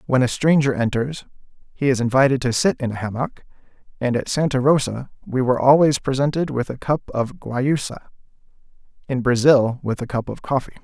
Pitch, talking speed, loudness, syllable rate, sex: 130 Hz, 175 wpm, -20 LUFS, 5.5 syllables/s, male